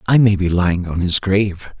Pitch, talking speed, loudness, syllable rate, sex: 95 Hz, 235 wpm, -17 LUFS, 5.6 syllables/s, male